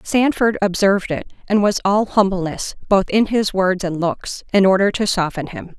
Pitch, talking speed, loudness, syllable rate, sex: 195 Hz, 185 wpm, -18 LUFS, 4.8 syllables/s, female